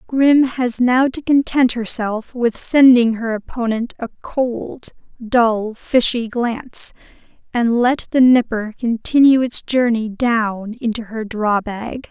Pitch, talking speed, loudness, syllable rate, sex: 235 Hz, 135 wpm, -17 LUFS, 3.6 syllables/s, female